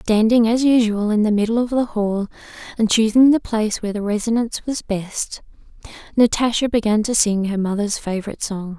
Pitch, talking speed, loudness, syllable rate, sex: 220 Hz, 180 wpm, -19 LUFS, 5.6 syllables/s, female